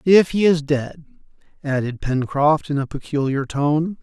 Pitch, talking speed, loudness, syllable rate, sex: 150 Hz, 150 wpm, -20 LUFS, 4.2 syllables/s, male